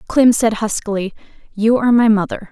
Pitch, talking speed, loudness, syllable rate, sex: 220 Hz, 165 wpm, -15 LUFS, 5.6 syllables/s, female